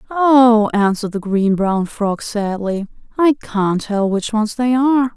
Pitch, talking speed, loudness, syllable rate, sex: 220 Hz, 165 wpm, -16 LUFS, 4.0 syllables/s, female